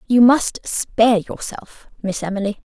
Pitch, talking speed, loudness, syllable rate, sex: 220 Hz, 135 wpm, -18 LUFS, 4.5 syllables/s, female